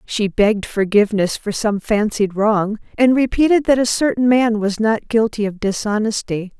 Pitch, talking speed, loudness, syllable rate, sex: 220 Hz, 165 wpm, -17 LUFS, 4.8 syllables/s, female